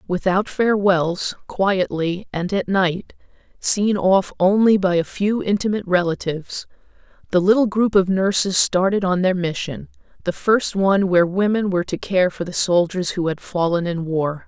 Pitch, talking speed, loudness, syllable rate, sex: 185 Hz, 160 wpm, -19 LUFS, 4.8 syllables/s, female